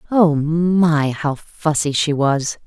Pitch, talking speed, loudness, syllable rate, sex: 155 Hz, 135 wpm, -18 LUFS, 2.9 syllables/s, female